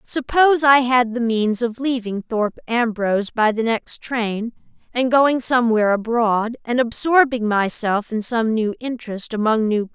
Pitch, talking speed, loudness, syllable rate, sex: 235 Hz, 165 wpm, -19 LUFS, 4.8 syllables/s, female